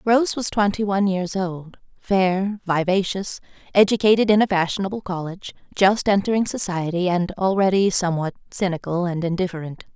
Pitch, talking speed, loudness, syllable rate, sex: 190 Hz, 135 wpm, -21 LUFS, 5.4 syllables/s, female